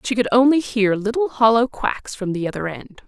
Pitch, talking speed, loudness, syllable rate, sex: 225 Hz, 235 wpm, -19 LUFS, 5.4 syllables/s, female